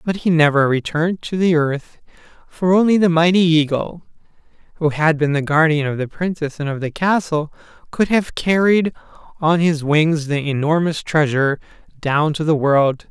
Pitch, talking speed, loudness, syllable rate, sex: 160 Hz, 170 wpm, -17 LUFS, 4.8 syllables/s, male